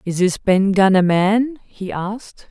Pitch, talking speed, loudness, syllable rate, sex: 200 Hz, 190 wpm, -17 LUFS, 3.8 syllables/s, female